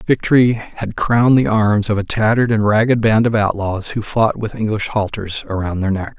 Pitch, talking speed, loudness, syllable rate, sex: 110 Hz, 205 wpm, -16 LUFS, 5.2 syllables/s, male